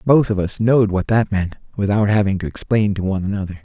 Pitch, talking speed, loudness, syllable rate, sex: 100 Hz, 230 wpm, -18 LUFS, 6.5 syllables/s, male